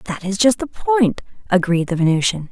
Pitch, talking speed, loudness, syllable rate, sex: 200 Hz, 190 wpm, -18 LUFS, 5.0 syllables/s, female